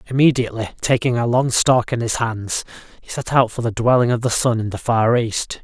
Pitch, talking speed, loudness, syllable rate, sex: 120 Hz, 225 wpm, -18 LUFS, 5.5 syllables/s, male